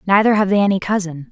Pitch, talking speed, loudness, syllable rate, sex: 195 Hz, 225 wpm, -16 LUFS, 6.8 syllables/s, female